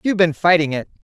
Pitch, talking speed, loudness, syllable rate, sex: 165 Hz, 210 wpm, -17 LUFS, 7.5 syllables/s, female